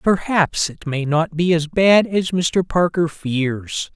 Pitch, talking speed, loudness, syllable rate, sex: 165 Hz, 165 wpm, -18 LUFS, 3.3 syllables/s, male